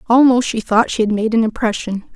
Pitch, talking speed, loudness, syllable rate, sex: 225 Hz, 225 wpm, -16 LUFS, 5.7 syllables/s, female